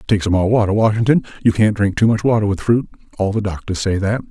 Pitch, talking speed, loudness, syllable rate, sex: 105 Hz, 225 wpm, -17 LUFS, 6.3 syllables/s, male